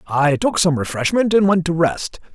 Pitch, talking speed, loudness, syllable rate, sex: 170 Hz, 205 wpm, -17 LUFS, 4.8 syllables/s, male